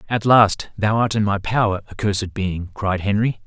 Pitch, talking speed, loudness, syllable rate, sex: 105 Hz, 190 wpm, -19 LUFS, 4.9 syllables/s, male